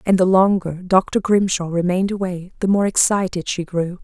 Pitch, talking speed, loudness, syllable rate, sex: 185 Hz, 180 wpm, -18 LUFS, 5.0 syllables/s, female